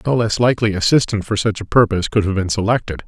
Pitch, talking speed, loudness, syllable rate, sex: 105 Hz, 235 wpm, -17 LUFS, 6.8 syllables/s, male